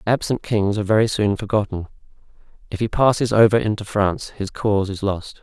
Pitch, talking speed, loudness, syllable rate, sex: 105 Hz, 175 wpm, -20 LUFS, 5.8 syllables/s, male